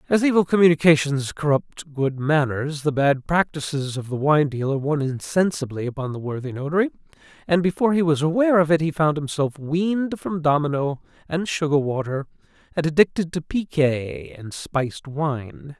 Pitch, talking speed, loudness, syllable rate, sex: 150 Hz, 160 wpm, -22 LUFS, 5.1 syllables/s, male